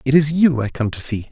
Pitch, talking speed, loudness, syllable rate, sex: 135 Hz, 320 wpm, -18 LUFS, 5.8 syllables/s, male